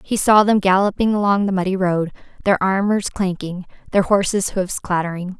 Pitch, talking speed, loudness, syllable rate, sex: 190 Hz, 165 wpm, -18 LUFS, 4.9 syllables/s, female